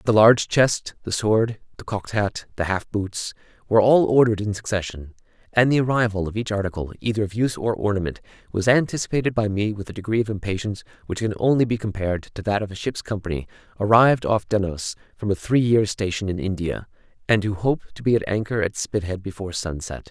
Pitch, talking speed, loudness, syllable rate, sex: 105 Hz, 205 wpm, -22 LUFS, 6.2 syllables/s, male